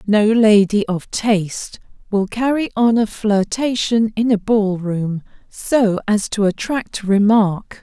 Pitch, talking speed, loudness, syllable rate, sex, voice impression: 215 Hz, 140 wpm, -17 LUFS, 3.6 syllables/s, female, feminine, adult-like, slightly refreshing, slightly sincere, friendly